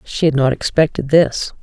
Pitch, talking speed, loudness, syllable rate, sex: 145 Hz, 185 wpm, -16 LUFS, 4.8 syllables/s, female